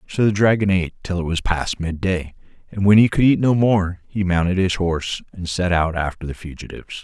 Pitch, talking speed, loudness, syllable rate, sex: 90 Hz, 230 wpm, -19 LUFS, 5.6 syllables/s, male